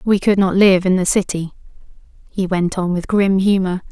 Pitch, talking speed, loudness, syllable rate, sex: 190 Hz, 200 wpm, -16 LUFS, 5.1 syllables/s, female